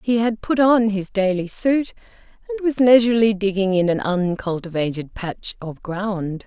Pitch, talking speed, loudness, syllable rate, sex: 205 Hz, 160 wpm, -20 LUFS, 4.8 syllables/s, female